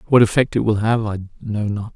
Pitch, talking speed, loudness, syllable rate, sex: 110 Hz, 245 wpm, -19 LUFS, 5.5 syllables/s, male